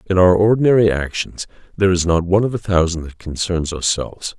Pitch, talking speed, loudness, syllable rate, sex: 90 Hz, 190 wpm, -17 LUFS, 6.0 syllables/s, male